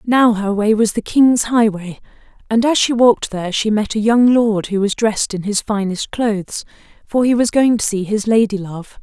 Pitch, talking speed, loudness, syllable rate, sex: 215 Hz, 220 wpm, -16 LUFS, 5.0 syllables/s, female